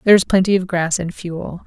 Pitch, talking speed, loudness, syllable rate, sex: 180 Hz, 255 wpm, -18 LUFS, 5.8 syllables/s, female